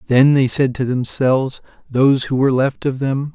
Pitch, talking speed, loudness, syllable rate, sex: 135 Hz, 195 wpm, -17 LUFS, 5.2 syllables/s, male